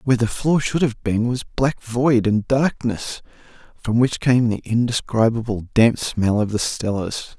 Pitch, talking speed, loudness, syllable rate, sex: 115 Hz, 170 wpm, -20 LUFS, 4.3 syllables/s, male